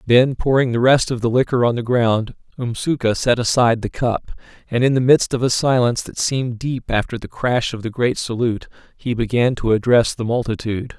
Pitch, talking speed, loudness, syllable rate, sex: 120 Hz, 210 wpm, -18 LUFS, 5.5 syllables/s, male